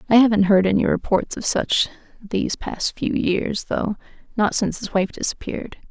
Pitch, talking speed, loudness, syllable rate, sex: 205 Hz, 165 wpm, -21 LUFS, 5.2 syllables/s, female